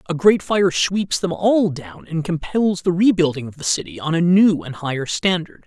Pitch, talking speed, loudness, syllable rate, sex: 170 Hz, 210 wpm, -19 LUFS, 4.8 syllables/s, male